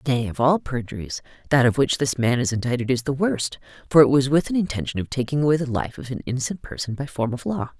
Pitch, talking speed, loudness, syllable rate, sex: 130 Hz, 255 wpm, -22 LUFS, 6.3 syllables/s, female